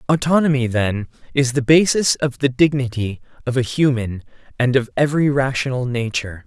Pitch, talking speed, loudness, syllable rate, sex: 130 Hz, 140 wpm, -18 LUFS, 5.2 syllables/s, male